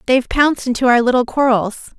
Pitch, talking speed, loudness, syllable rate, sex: 250 Hz, 180 wpm, -15 LUFS, 6.2 syllables/s, female